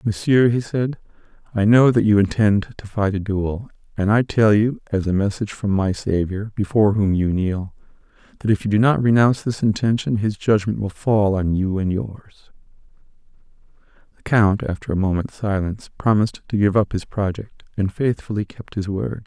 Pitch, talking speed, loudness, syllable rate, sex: 105 Hz, 185 wpm, -20 LUFS, 5.1 syllables/s, male